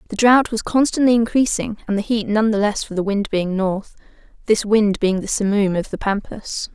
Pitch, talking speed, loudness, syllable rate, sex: 210 Hz, 215 wpm, -19 LUFS, 5.1 syllables/s, female